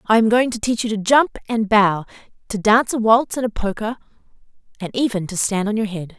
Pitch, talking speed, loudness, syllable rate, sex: 215 Hz, 235 wpm, -19 LUFS, 5.8 syllables/s, female